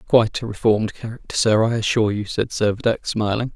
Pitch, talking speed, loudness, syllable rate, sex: 110 Hz, 185 wpm, -20 LUFS, 6.3 syllables/s, male